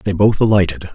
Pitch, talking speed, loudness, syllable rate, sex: 100 Hz, 190 wpm, -15 LUFS, 5.6 syllables/s, male